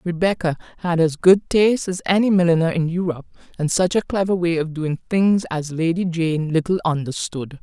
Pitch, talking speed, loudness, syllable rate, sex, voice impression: 170 Hz, 180 wpm, -20 LUFS, 5.3 syllables/s, female, slightly masculine, slightly feminine, very gender-neutral, adult-like, slightly thin, tensed, powerful, bright, slightly soft, very clear, fluent, cool, very intellectual, sincere, calm, slightly friendly, slightly reassuring, very unique, slightly elegant, slightly sweet, lively, slightly strict, slightly intense